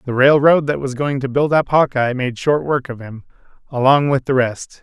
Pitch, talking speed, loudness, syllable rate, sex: 135 Hz, 225 wpm, -16 LUFS, 5.0 syllables/s, male